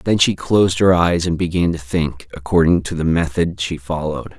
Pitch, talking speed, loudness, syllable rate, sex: 85 Hz, 205 wpm, -17 LUFS, 5.1 syllables/s, male